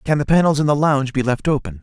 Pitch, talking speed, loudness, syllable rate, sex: 140 Hz, 295 wpm, -17 LUFS, 6.9 syllables/s, male